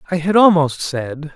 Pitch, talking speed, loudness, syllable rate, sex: 160 Hz, 175 wpm, -15 LUFS, 4.5 syllables/s, male